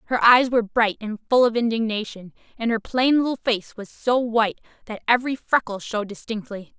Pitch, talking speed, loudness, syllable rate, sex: 225 Hz, 185 wpm, -22 LUFS, 5.8 syllables/s, female